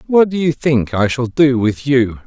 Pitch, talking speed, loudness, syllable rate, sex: 130 Hz, 240 wpm, -15 LUFS, 4.4 syllables/s, male